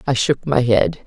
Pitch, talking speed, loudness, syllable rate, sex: 135 Hz, 225 wpm, -17 LUFS, 4.7 syllables/s, female